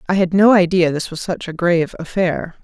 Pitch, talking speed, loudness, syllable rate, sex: 175 Hz, 230 wpm, -17 LUFS, 5.5 syllables/s, female